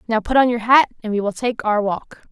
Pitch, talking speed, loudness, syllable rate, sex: 225 Hz, 285 wpm, -18 LUFS, 5.6 syllables/s, female